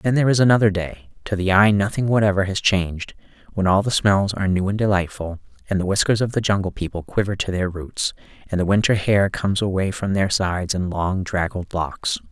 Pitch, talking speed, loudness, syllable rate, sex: 100 Hz, 205 wpm, -20 LUFS, 5.7 syllables/s, male